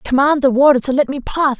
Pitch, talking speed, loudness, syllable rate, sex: 270 Hz, 265 wpm, -14 LUFS, 6.0 syllables/s, female